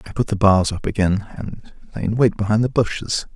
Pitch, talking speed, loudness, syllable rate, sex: 105 Hz, 230 wpm, -19 LUFS, 5.4 syllables/s, male